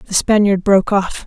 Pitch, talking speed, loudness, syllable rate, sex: 195 Hz, 190 wpm, -14 LUFS, 4.9 syllables/s, female